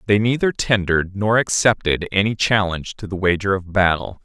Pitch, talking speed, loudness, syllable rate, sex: 100 Hz, 170 wpm, -19 LUFS, 5.5 syllables/s, male